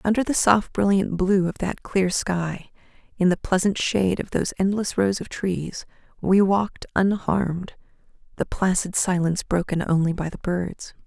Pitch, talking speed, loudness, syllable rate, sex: 185 Hz, 165 wpm, -23 LUFS, 4.7 syllables/s, female